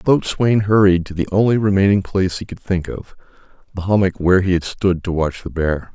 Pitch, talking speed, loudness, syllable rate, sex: 95 Hz, 220 wpm, -17 LUFS, 5.8 syllables/s, male